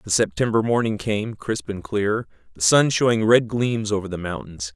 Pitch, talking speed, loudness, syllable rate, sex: 105 Hz, 190 wpm, -21 LUFS, 4.7 syllables/s, male